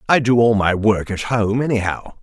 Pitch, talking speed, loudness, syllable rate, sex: 110 Hz, 215 wpm, -17 LUFS, 5.0 syllables/s, male